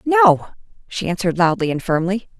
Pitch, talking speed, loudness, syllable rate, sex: 195 Hz, 150 wpm, -18 LUFS, 5.5 syllables/s, female